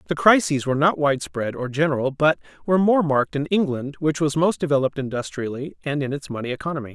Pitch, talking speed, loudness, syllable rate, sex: 145 Hz, 200 wpm, -22 LUFS, 6.6 syllables/s, male